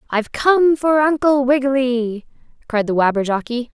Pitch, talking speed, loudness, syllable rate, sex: 260 Hz, 125 wpm, -17 LUFS, 4.8 syllables/s, female